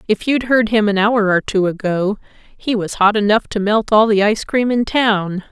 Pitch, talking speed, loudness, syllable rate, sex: 210 Hz, 230 wpm, -16 LUFS, 4.8 syllables/s, female